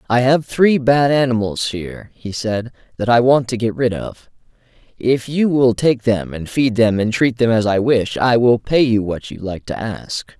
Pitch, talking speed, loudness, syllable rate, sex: 120 Hz, 220 wpm, -17 LUFS, 4.5 syllables/s, male